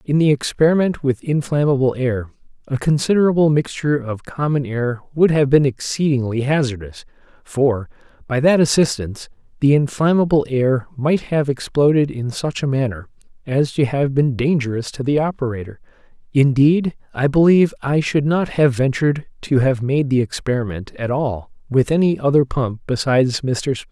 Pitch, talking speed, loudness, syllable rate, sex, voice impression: 135 Hz, 155 wpm, -18 LUFS, 5.1 syllables/s, male, masculine, adult-like, slightly halting, refreshing, slightly sincere